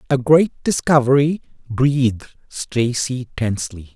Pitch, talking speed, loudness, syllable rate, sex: 130 Hz, 90 wpm, -18 LUFS, 4.3 syllables/s, male